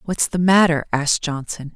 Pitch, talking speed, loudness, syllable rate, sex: 160 Hz, 170 wpm, -18 LUFS, 5.1 syllables/s, female